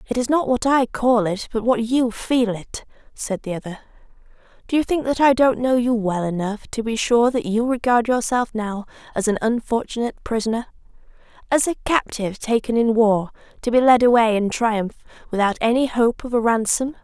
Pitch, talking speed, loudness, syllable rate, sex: 235 Hz, 190 wpm, -20 LUFS, 5.3 syllables/s, female